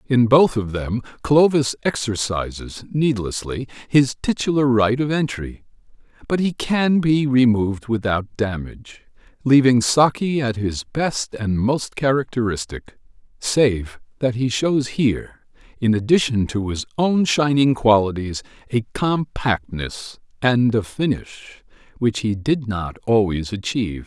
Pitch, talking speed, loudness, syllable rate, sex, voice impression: 120 Hz, 125 wpm, -20 LUFS, 4.1 syllables/s, male, very masculine, very adult-like, slightly old, very thick, tensed, very powerful, slightly bright, soft, very clear, fluent, slightly raspy, very cool, very intellectual, refreshing, very sincere, very calm, very mature, friendly, very reassuring, very unique, elegant, slightly wild, sweet, very lively, kind, slightly intense